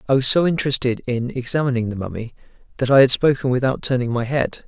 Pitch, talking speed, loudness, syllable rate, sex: 130 Hz, 205 wpm, -19 LUFS, 6.5 syllables/s, male